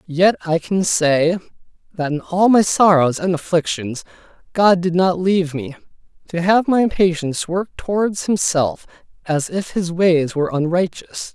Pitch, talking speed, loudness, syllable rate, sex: 175 Hz, 155 wpm, -18 LUFS, 4.5 syllables/s, male